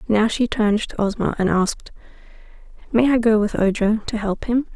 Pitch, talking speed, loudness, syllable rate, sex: 220 Hz, 190 wpm, -20 LUFS, 5.4 syllables/s, female